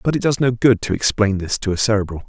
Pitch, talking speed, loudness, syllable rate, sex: 110 Hz, 290 wpm, -18 LUFS, 6.5 syllables/s, male